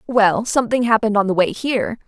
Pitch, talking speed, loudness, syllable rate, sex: 220 Hz, 205 wpm, -18 LUFS, 6.4 syllables/s, female